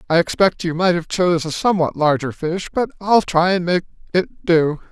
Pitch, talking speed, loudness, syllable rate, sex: 175 Hz, 210 wpm, -18 LUFS, 5.4 syllables/s, male